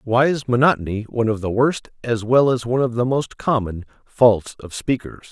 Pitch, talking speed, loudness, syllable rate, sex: 120 Hz, 205 wpm, -19 LUFS, 5.1 syllables/s, male